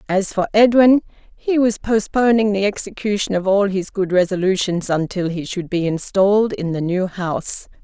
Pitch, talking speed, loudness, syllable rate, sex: 195 Hz, 170 wpm, -18 LUFS, 4.9 syllables/s, female